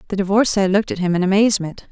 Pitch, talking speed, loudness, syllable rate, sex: 195 Hz, 220 wpm, -17 LUFS, 7.7 syllables/s, female